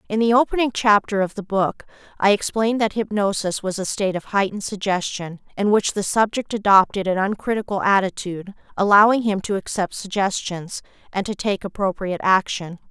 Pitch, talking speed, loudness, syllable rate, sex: 200 Hz, 165 wpm, -20 LUFS, 5.6 syllables/s, female